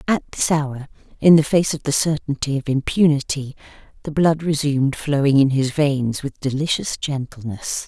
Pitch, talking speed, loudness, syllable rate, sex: 145 Hz, 160 wpm, -19 LUFS, 4.8 syllables/s, female